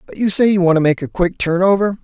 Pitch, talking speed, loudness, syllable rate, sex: 180 Hz, 325 wpm, -15 LUFS, 6.5 syllables/s, male